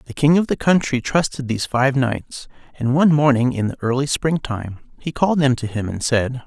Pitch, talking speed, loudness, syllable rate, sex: 130 Hz, 225 wpm, -19 LUFS, 5.4 syllables/s, male